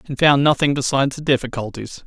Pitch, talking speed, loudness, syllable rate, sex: 135 Hz, 175 wpm, -18 LUFS, 6.2 syllables/s, male